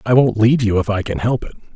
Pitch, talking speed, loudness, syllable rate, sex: 110 Hz, 310 wpm, -17 LUFS, 7.0 syllables/s, male